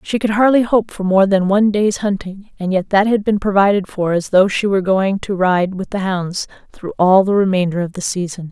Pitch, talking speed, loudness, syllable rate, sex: 195 Hz, 240 wpm, -16 LUFS, 5.4 syllables/s, female